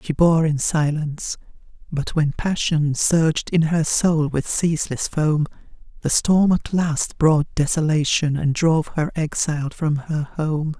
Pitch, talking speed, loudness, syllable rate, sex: 155 Hz, 145 wpm, -20 LUFS, 4.1 syllables/s, female